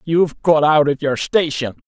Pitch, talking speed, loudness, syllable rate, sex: 150 Hz, 190 wpm, -17 LUFS, 4.7 syllables/s, male